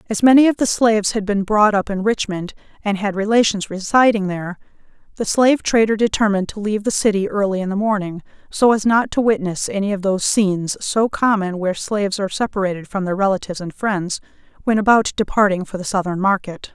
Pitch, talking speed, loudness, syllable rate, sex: 205 Hz, 195 wpm, -18 LUFS, 6.1 syllables/s, female